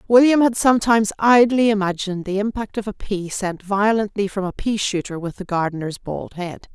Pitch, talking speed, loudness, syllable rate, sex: 205 Hz, 185 wpm, -20 LUFS, 5.4 syllables/s, female